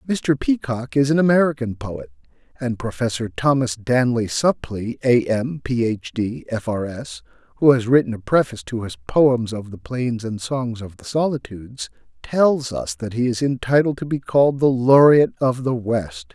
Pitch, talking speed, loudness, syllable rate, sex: 125 Hz, 180 wpm, -20 LUFS, 4.7 syllables/s, male